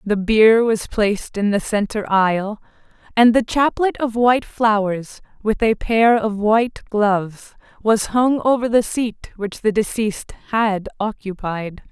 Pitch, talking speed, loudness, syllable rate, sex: 215 Hz, 150 wpm, -18 LUFS, 4.2 syllables/s, female